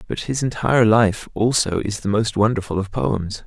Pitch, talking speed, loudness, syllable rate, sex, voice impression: 105 Hz, 190 wpm, -20 LUFS, 5.0 syllables/s, male, masculine, adult-like, slightly dark, sincere, slightly calm, slightly friendly